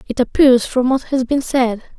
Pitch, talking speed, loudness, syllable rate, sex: 255 Hz, 210 wpm, -16 LUFS, 4.7 syllables/s, female